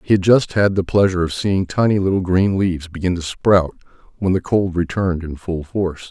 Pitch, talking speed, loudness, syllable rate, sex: 90 Hz, 205 wpm, -18 LUFS, 5.4 syllables/s, male